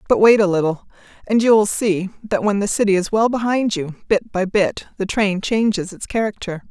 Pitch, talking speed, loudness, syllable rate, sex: 200 Hz, 215 wpm, -18 LUFS, 5.2 syllables/s, female